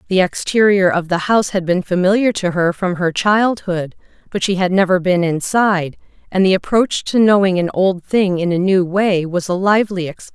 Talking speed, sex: 205 wpm, female